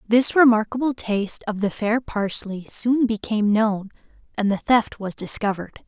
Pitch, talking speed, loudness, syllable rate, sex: 220 Hz, 155 wpm, -21 LUFS, 4.8 syllables/s, female